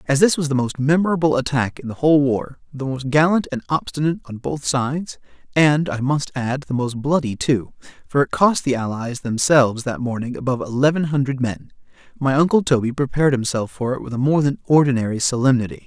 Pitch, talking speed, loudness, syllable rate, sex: 135 Hz, 185 wpm, -19 LUFS, 5.8 syllables/s, male